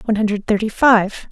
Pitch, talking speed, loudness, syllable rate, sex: 215 Hz, 180 wpm, -16 LUFS, 5.6 syllables/s, female